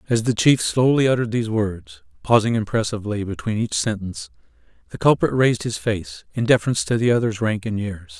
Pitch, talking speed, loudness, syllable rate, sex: 105 Hz, 185 wpm, -20 LUFS, 6.0 syllables/s, male